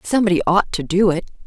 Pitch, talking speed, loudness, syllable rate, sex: 185 Hz, 205 wpm, -18 LUFS, 6.7 syllables/s, female